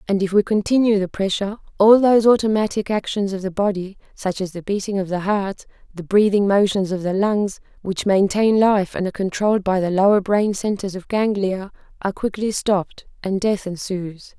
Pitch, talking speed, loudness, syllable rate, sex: 200 Hz, 190 wpm, -19 LUFS, 5.4 syllables/s, female